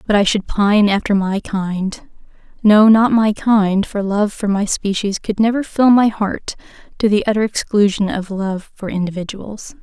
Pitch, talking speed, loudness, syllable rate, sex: 205 Hz, 175 wpm, -16 LUFS, 4.4 syllables/s, female